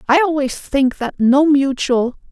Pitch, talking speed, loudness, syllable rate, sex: 275 Hz, 155 wpm, -16 LUFS, 4.0 syllables/s, female